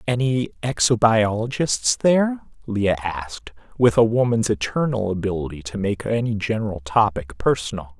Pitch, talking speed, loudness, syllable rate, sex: 110 Hz, 120 wpm, -21 LUFS, 4.9 syllables/s, male